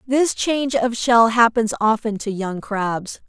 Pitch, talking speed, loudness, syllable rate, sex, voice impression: 230 Hz, 165 wpm, -19 LUFS, 3.9 syllables/s, female, feminine, slightly adult-like, slightly powerful, slightly clear, slightly intellectual